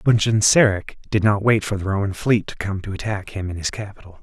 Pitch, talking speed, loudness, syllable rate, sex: 100 Hz, 240 wpm, -20 LUFS, 5.8 syllables/s, male